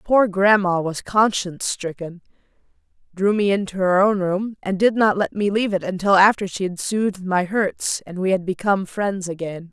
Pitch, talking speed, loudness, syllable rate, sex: 190 Hz, 190 wpm, -20 LUFS, 5.0 syllables/s, female